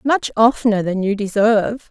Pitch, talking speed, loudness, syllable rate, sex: 215 Hz, 160 wpm, -17 LUFS, 5.1 syllables/s, female